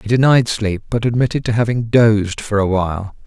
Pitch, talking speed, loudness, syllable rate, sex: 110 Hz, 200 wpm, -16 LUFS, 5.5 syllables/s, male